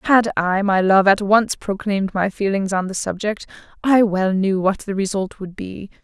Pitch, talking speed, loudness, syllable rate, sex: 200 Hz, 200 wpm, -19 LUFS, 4.7 syllables/s, female